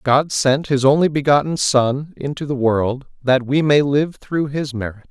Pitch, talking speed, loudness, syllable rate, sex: 140 Hz, 190 wpm, -18 LUFS, 4.5 syllables/s, male